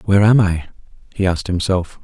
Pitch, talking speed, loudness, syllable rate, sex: 95 Hz, 175 wpm, -17 LUFS, 6.3 syllables/s, male